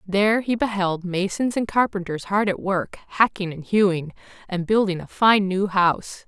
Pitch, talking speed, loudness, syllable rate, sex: 195 Hz, 170 wpm, -22 LUFS, 4.8 syllables/s, female